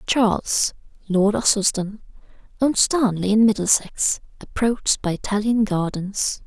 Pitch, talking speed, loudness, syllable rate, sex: 210 Hz, 100 wpm, -20 LUFS, 4.3 syllables/s, female